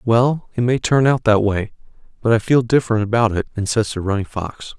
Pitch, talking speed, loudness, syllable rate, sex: 115 Hz, 200 wpm, -18 LUFS, 5.4 syllables/s, male